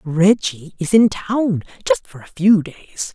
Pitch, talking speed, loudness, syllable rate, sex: 180 Hz, 170 wpm, -18 LUFS, 3.6 syllables/s, female